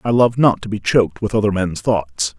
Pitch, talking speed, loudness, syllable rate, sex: 100 Hz, 250 wpm, -17 LUFS, 5.2 syllables/s, male